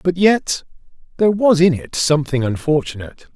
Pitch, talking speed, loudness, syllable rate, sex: 155 Hz, 145 wpm, -17 LUFS, 5.6 syllables/s, male